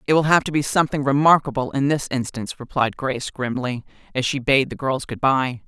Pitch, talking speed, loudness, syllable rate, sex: 135 Hz, 210 wpm, -21 LUFS, 5.8 syllables/s, female